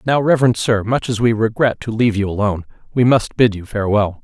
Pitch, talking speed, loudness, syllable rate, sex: 110 Hz, 225 wpm, -17 LUFS, 6.3 syllables/s, male